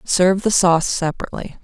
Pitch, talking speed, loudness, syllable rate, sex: 180 Hz, 145 wpm, -17 LUFS, 6.6 syllables/s, female